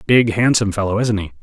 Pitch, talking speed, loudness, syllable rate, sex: 110 Hz, 210 wpm, -17 LUFS, 6.6 syllables/s, male